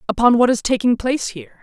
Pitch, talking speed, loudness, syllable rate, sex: 240 Hz, 220 wpm, -17 LUFS, 6.8 syllables/s, female